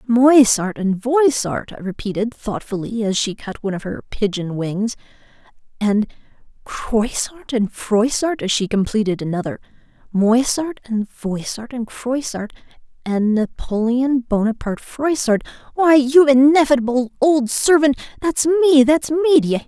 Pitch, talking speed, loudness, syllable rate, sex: 240 Hz, 115 wpm, -18 LUFS, 4.4 syllables/s, female